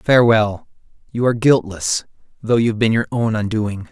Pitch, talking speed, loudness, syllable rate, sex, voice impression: 110 Hz, 155 wpm, -17 LUFS, 5.3 syllables/s, male, masculine, adult-like, slightly refreshing, slightly friendly, slightly unique